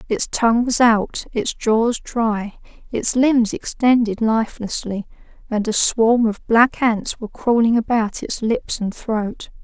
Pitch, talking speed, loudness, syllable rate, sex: 225 Hz, 150 wpm, -19 LUFS, 3.9 syllables/s, female